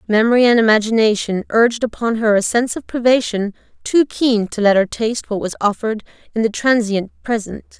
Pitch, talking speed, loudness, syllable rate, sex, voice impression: 225 Hz, 175 wpm, -17 LUFS, 5.7 syllables/s, female, very feminine, slightly middle-aged, thin, very tensed, very powerful, bright, very hard, very clear, very fluent, raspy, slightly cool, slightly intellectual, very refreshing, sincere, slightly calm, slightly friendly, slightly reassuring, very unique, slightly elegant, very wild, very lively, very strict, very intense, very sharp, light